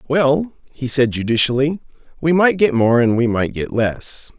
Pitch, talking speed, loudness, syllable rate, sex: 135 Hz, 180 wpm, -17 LUFS, 4.5 syllables/s, male